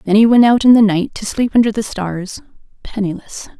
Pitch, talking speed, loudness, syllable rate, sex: 210 Hz, 215 wpm, -14 LUFS, 5.3 syllables/s, female